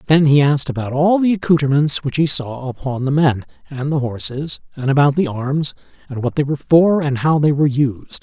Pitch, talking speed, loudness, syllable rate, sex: 140 Hz, 220 wpm, -17 LUFS, 5.4 syllables/s, male